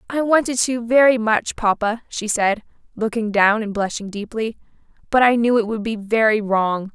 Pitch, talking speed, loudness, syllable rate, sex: 220 Hz, 180 wpm, -19 LUFS, 4.8 syllables/s, female